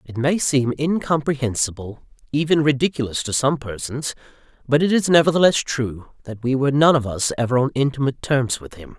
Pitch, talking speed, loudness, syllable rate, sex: 135 Hz, 175 wpm, -20 LUFS, 5.7 syllables/s, male